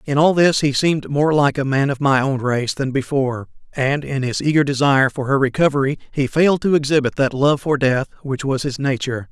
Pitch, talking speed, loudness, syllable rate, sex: 140 Hz, 225 wpm, -18 LUFS, 5.6 syllables/s, male